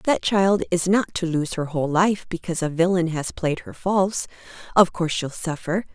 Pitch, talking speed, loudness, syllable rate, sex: 175 Hz, 200 wpm, -22 LUFS, 5.2 syllables/s, female